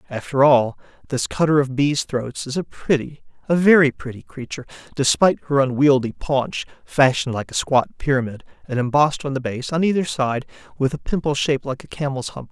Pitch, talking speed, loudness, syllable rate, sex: 140 Hz, 185 wpm, -20 LUFS, 5.6 syllables/s, male